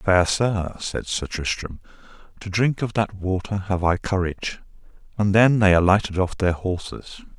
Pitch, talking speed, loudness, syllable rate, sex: 95 Hz, 165 wpm, -22 LUFS, 4.6 syllables/s, male